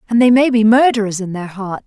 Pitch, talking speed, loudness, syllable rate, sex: 220 Hz, 260 wpm, -14 LUFS, 6.0 syllables/s, female